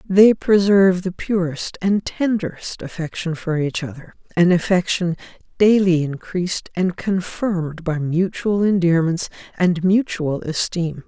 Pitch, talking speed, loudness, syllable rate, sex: 180 Hz, 120 wpm, -19 LUFS, 4.2 syllables/s, female